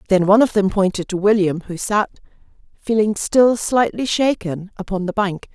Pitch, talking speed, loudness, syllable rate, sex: 205 Hz, 175 wpm, -18 LUFS, 5.0 syllables/s, female